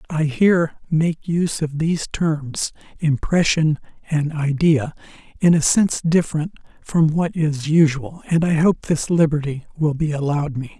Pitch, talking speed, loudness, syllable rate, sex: 155 Hz, 150 wpm, -19 LUFS, 4.5 syllables/s, male